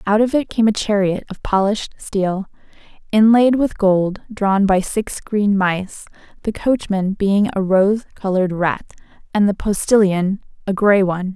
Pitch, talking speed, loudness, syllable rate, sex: 200 Hz, 160 wpm, -18 LUFS, 4.4 syllables/s, female